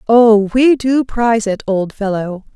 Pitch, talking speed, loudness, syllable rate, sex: 220 Hz, 165 wpm, -14 LUFS, 4.0 syllables/s, female